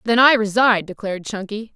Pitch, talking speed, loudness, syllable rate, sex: 215 Hz, 170 wpm, -18 LUFS, 5.5 syllables/s, female